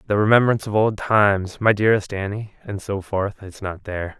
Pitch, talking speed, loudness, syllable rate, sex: 100 Hz, 170 wpm, -20 LUFS, 5.7 syllables/s, male